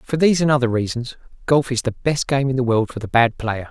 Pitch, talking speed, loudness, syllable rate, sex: 125 Hz, 275 wpm, -19 LUFS, 6.0 syllables/s, male